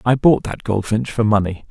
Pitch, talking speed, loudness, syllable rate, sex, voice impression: 110 Hz, 210 wpm, -18 LUFS, 5.0 syllables/s, male, very masculine, very adult-like, old, very thick, very relaxed, very weak, dark, soft, very muffled, slightly fluent, very raspy, cool, very intellectual, very sincere, very calm, very mature, friendly, very reassuring, elegant, slightly wild, very sweet, very kind, modest